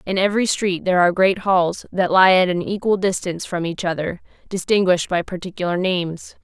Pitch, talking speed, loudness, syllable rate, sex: 185 Hz, 185 wpm, -19 LUFS, 5.9 syllables/s, female